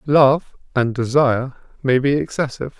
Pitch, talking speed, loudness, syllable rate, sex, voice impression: 135 Hz, 130 wpm, -19 LUFS, 5.0 syllables/s, male, masculine, adult-like, thick, tensed, soft, raspy, calm, mature, wild, slightly kind, slightly modest